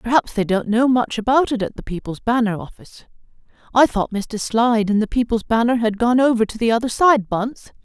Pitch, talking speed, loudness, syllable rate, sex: 230 Hz, 215 wpm, -19 LUFS, 5.7 syllables/s, female